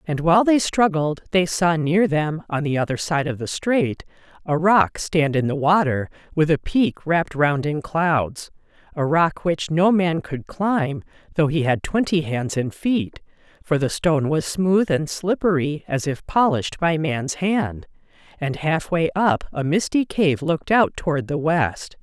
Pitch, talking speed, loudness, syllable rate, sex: 160 Hz, 180 wpm, -21 LUFS, 4.2 syllables/s, female